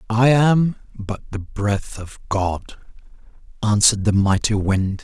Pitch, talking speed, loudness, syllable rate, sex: 105 Hz, 130 wpm, -19 LUFS, 3.9 syllables/s, male